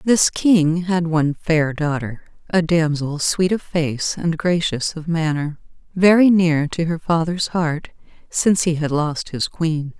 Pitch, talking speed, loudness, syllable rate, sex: 165 Hz, 160 wpm, -19 LUFS, 3.9 syllables/s, female